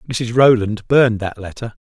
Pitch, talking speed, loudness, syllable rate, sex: 115 Hz, 165 wpm, -16 LUFS, 5.1 syllables/s, male